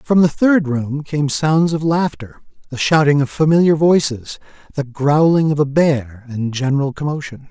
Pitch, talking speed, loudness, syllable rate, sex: 145 Hz, 170 wpm, -16 LUFS, 4.6 syllables/s, male